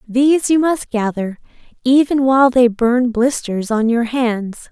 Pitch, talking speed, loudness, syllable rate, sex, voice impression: 245 Hz, 155 wpm, -16 LUFS, 4.1 syllables/s, female, feminine, adult-like, slightly clear, sincere, slightly calm, slightly kind